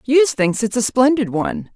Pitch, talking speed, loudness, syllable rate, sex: 235 Hz, 205 wpm, -17 LUFS, 5.5 syllables/s, female